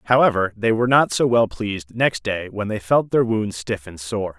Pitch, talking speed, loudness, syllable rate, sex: 110 Hz, 235 wpm, -20 LUFS, 4.9 syllables/s, male